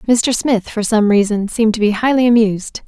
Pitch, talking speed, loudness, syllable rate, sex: 220 Hz, 210 wpm, -15 LUFS, 5.3 syllables/s, female